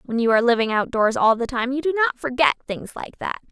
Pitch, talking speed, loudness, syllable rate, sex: 250 Hz, 255 wpm, -21 LUFS, 6.2 syllables/s, female